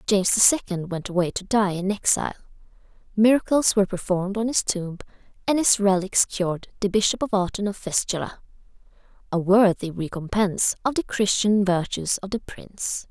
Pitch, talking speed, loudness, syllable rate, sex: 200 Hz, 155 wpm, -22 LUFS, 5.5 syllables/s, female